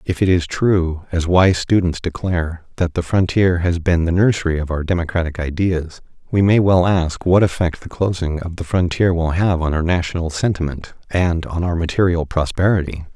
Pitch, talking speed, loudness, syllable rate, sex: 85 Hz, 185 wpm, -18 LUFS, 5.1 syllables/s, male